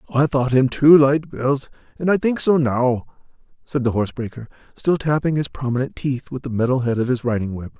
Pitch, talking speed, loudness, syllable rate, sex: 135 Hz, 215 wpm, -20 LUFS, 5.5 syllables/s, male